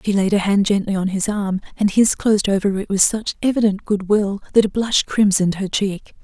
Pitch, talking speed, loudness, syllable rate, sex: 200 Hz, 230 wpm, -18 LUFS, 5.4 syllables/s, female